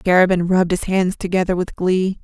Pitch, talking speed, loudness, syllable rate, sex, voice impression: 185 Hz, 190 wpm, -18 LUFS, 5.7 syllables/s, female, feminine, adult-like, tensed, powerful, clear, fluent, intellectual, friendly, elegant, lively, slightly sharp